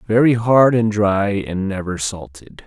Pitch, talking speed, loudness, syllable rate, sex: 105 Hz, 155 wpm, -17 LUFS, 3.9 syllables/s, male